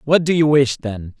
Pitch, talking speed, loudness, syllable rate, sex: 135 Hz, 250 wpm, -16 LUFS, 4.7 syllables/s, male